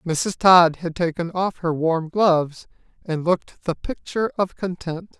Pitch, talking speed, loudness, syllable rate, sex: 175 Hz, 160 wpm, -21 LUFS, 4.3 syllables/s, male